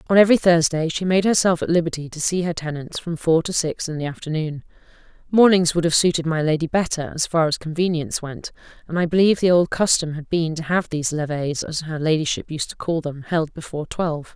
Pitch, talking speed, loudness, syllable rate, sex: 165 Hz, 220 wpm, -21 LUFS, 5.8 syllables/s, female